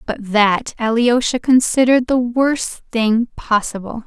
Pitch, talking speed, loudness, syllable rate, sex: 235 Hz, 120 wpm, -16 LUFS, 3.9 syllables/s, female